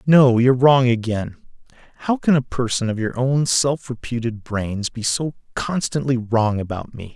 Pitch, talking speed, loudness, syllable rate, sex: 125 Hz, 160 wpm, -20 LUFS, 4.6 syllables/s, male